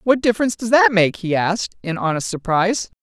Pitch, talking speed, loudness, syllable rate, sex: 200 Hz, 200 wpm, -18 LUFS, 6.1 syllables/s, female